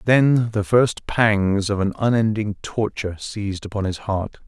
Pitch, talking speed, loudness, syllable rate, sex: 105 Hz, 160 wpm, -21 LUFS, 4.4 syllables/s, male